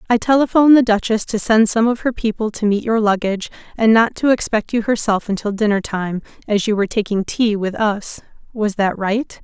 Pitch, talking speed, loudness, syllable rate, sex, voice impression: 215 Hz, 210 wpm, -17 LUFS, 5.5 syllables/s, female, feminine, adult-like, tensed, slightly powerful, soft, clear, intellectual, calm, elegant, lively, slightly sharp